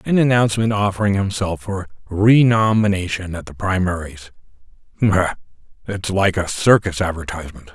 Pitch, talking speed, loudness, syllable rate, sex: 95 Hz, 110 wpm, -18 LUFS, 5.3 syllables/s, male